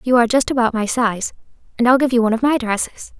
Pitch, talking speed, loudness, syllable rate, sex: 240 Hz, 265 wpm, -17 LUFS, 6.8 syllables/s, female